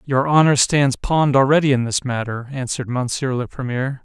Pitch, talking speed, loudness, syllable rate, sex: 135 Hz, 180 wpm, -18 LUFS, 5.2 syllables/s, male